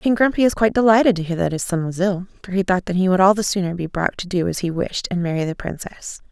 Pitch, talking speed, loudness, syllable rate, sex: 190 Hz, 305 wpm, -19 LUFS, 6.5 syllables/s, female